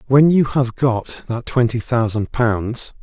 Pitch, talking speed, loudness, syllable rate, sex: 120 Hz, 160 wpm, -18 LUFS, 3.7 syllables/s, male